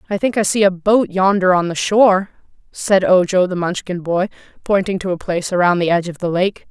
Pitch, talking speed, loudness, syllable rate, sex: 185 Hz, 225 wpm, -16 LUFS, 5.7 syllables/s, female